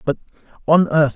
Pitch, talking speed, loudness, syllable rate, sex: 155 Hz, 155 wpm, -17 LUFS, 5.5 syllables/s, male